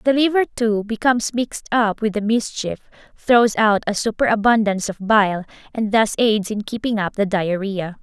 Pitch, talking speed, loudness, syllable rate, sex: 215 Hz, 170 wpm, -19 LUFS, 4.9 syllables/s, female